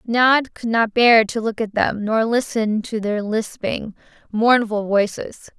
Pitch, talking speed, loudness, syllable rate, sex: 220 Hz, 160 wpm, -19 LUFS, 3.8 syllables/s, female